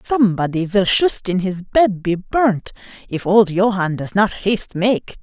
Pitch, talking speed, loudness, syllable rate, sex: 195 Hz, 170 wpm, -17 LUFS, 4.2 syllables/s, female